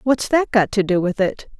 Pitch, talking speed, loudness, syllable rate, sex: 215 Hz, 265 wpm, -18 LUFS, 5.0 syllables/s, female